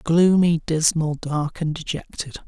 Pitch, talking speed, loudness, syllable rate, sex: 160 Hz, 120 wpm, -21 LUFS, 3.9 syllables/s, male